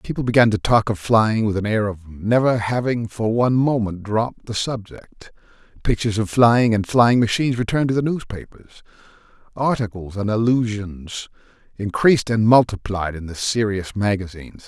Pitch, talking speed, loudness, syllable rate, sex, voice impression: 110 Hz, 155 wpm, -19 LUFS, 5.2 syllables/s, male, masculine, adult-like, slightly powerful, slightly unique, slightly strict